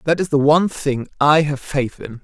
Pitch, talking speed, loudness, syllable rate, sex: 145 Hz, 240 wpm, -18 LUFS, 5.0 syllables/s, male